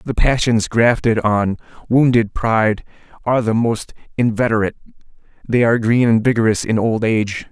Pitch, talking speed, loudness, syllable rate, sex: 115 Hz, 145 wpm, -17 LUFS, 5.4 syllables/s, male